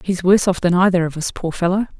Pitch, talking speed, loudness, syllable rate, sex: 180 Hz, 270 wpm, -17 LUFS, 6.7 syllables/s, female